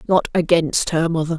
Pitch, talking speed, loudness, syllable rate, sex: 165 Hz, 175 wpm, -18 LUFS, 5.0 syllables/s, female